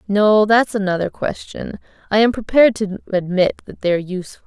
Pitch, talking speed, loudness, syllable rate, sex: 205 Hz, 160 wpm, -17 LUFS, 5.4 syllables/s, female